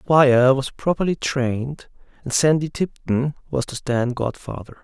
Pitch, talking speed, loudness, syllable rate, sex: 135 Hz, 150 wpm, -21 LUFS, 4.5 syllables/s, male